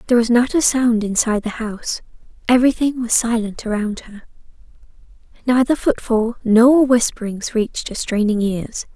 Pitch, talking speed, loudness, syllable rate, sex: 230 Hz, 140 wpm, -18 LUFS, 5.1 syllables/s, female